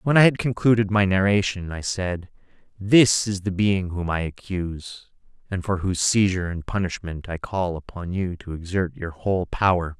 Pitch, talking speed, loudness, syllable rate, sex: 95 Hz, 180 wpm, -23 LUFS, 5.0 syllables/s, male